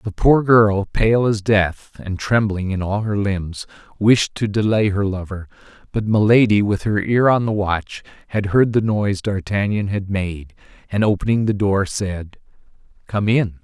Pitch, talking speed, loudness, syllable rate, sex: 105 Hz, 170 wpm, -18 LUFS, 4.3 syllables/s, male